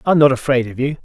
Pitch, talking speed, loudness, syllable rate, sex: 135 Hz, 345 wpm, -16 LUFS, 8.0 syllables/s, male